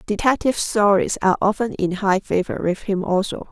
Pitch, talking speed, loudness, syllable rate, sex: 200 Hz, 170 wpm, -20 LUFS, 5.5 syllables/s, female